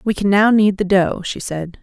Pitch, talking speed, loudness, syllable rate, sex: 195 Hz, 265 wpm, -16 LUFS, 4.7 syllables/s, female